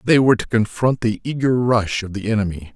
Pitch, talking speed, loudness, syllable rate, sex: 110 Hz, 220 wpm, -19 LUFS, 5.8 syllables/s, male